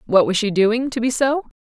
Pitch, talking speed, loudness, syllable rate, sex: 230 Hz, 260 wpm, -18 LUFS, 5.3 syllables/s, female